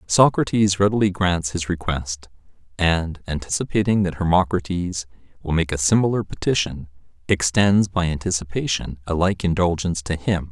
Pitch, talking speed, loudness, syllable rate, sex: 90 Hz, 125 wpm, -21 LUFS, 5.1 syllables/s, male